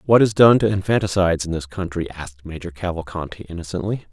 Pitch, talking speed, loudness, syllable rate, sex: 90 Hz, 175 wpm, -20 LUFS, 6.4 syllables/s, male